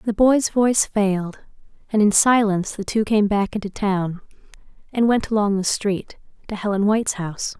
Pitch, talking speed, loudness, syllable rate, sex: 205 Hz, 175 wpm, -20 LUFS, 5.1 syllables/s, female